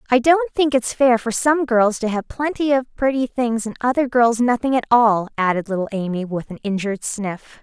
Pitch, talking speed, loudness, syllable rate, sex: 235 Hz, 210 wpm, -19 LUFS, 5.0 syllables/s, female